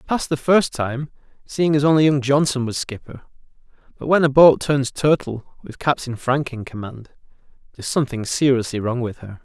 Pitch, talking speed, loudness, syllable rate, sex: 135 Hz, 185 wpm, -19 LUFS, 5.3 syllables/s, male